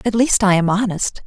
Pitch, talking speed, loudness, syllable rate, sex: 200 Hz, 235 wpm, -16 LUFS, 5.2 syllables/s, female